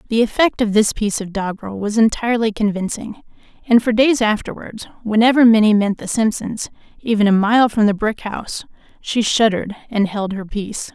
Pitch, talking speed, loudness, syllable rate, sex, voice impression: 215 Hz, 175 wpm, -17 LUFS, 5.6 syllables/s, female, feminine, adult-like, thin, tensed, powerful, bright, clear, fluent, intellectual, friendly, lively, slightly strict